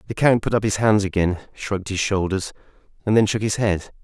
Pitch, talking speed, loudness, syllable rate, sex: 100 Hz, 225 wpm, -21 LUFS, 5.9 syllables/s, male